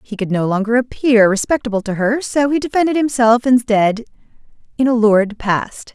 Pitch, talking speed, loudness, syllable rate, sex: 235 Hz, 170 wpm, -15 LUFS, 5.3 syllables/s, female